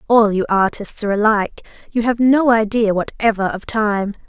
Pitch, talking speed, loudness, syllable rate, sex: 215 Hz, 155 wpm, -17 LUFS, 5.3 syllables/s, female